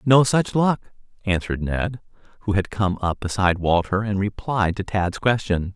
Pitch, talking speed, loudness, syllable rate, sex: 100 Hz, 165 wpm, -22 LUFS, 4.7 syllables/s, male